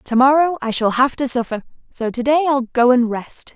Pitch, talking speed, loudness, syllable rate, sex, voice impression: 255 Hz, 200 wpm, -17 LUFS, 5.1 syllables/s, female, feminine, adult-like, slightly relaxed, powerful, bright, soft, slightly raspy, intellectual, calm, friendly, reassuring, elegant, slightly lively, kind